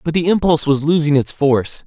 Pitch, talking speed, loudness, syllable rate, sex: 150 Hz, 225 wpm, -16 LUFS, 6.2 syllables/s, male